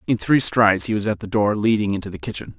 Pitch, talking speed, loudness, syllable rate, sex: 105 Hz, 280 wpm, -20 LUFS, 6.6 syllables/s, male